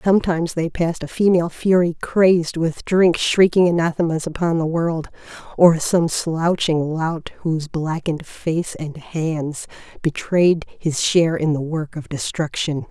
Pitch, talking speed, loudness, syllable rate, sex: 165 Hz, 145 wpm, -19 LUFS, 4.4 syllables/s, female